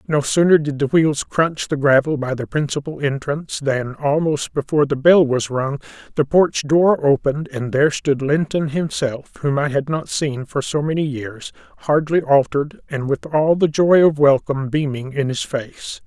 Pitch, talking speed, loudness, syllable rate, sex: 145 Hz, 185 wpm, -18 LUFS, 4.8 syllables/s, male